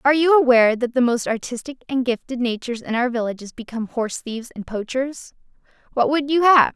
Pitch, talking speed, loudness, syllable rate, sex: 250 Hz, 195 wpm, -20 LUFS, 6.2 syllables/s, female